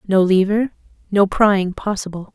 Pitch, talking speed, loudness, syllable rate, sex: 195 Hz, 130 wpm, -18 LUFS, 4.4 syllables/s, female